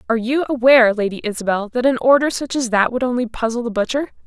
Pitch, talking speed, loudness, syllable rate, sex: 240 Hz, 225 wpm, -17 LUFS, 6.7 syllables/s, female